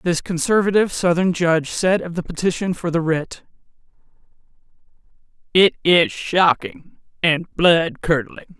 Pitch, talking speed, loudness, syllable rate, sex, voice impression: 170 Hz, 120 wpm, -18 LUFS, 4.5 syllables/s, female, feminine, adult-like, slightly relaxed, slightly soft, muffled, intellectual, calm, reassuring, slightly elegant, slightly lively